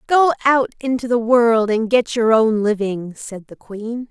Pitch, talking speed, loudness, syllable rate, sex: 230 Hz, 190 wpm, -17 LUFS, 4.0 syllables/s, female